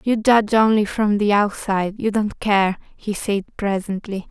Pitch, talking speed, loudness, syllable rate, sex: 205 Hz, 155 wpm, -19 LUFS, 4.6 syllables/s, female